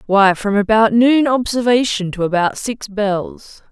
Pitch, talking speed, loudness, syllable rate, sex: 215 Hz, 145 wpm, -15 LUFS, 4.0 syllables/s, female